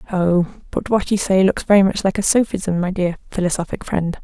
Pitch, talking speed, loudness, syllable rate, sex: 185 Hz, 210 wpm, -18 LUFS, 5.5 syllables/s, female